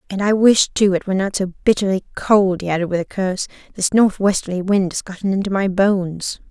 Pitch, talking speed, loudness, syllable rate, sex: 190 Hz, 220 wpm, -18 LUFS, 5.6 syllables/s, female